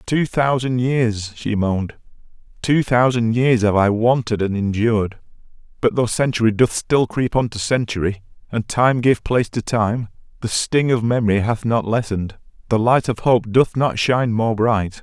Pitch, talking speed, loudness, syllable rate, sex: 115 Hz, 170 wpm, -19 LUFS, 4.8 syllables/s, male